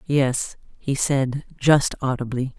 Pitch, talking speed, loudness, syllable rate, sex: 135 Hz, 115 wpm, -22 LUFS, 3.3 syllables/s, female